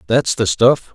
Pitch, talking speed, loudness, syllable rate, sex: 115 Hz, 190 wpm, -15 LUFS, 4.1 syllables/s, male